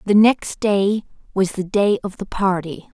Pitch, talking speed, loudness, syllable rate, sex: 195 Hz, 180 wpm, -19 LUFS, 4.2 syllables/s, female